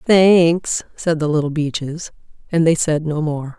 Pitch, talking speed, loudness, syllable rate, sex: 160 Hz, 170 wpm, -17 LUFS, 4.0 syllables/s, female